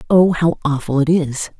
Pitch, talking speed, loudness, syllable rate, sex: 155 Hz, 190 wpm, -16 LUFS, 4.7 syllables/s, female